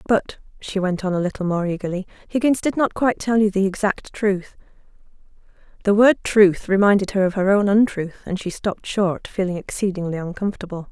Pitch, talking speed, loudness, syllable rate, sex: 195 Hz, 180 wpm, -20 LUFS, 5.8 syllables/s, female